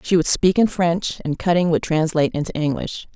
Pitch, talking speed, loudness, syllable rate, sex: 165 Hz, 210 wpm, -19 LUFS, 5.3 syllables/s, female